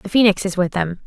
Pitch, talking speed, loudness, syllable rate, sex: 190 Hz, 280 wpm, -18 LUFS, 5.9 syllables/s, female